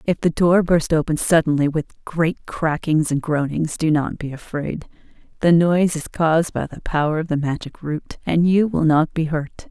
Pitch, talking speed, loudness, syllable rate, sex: 160 Hz, 200 wpm, -20 LUFS, 4.7 syllables/s, female